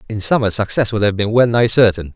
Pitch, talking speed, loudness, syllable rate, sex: 110 Hz, 250 wpm, -15 LUFS, 6.1 syllables/s, male